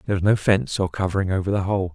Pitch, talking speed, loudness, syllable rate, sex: 95 Hz, 280 wpm, -22 LUFS, 7.8 syllables/s, male